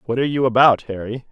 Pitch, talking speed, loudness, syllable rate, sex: 125 Hz, 230 wpm, -18 LUFS, 6.8 syllables/s, male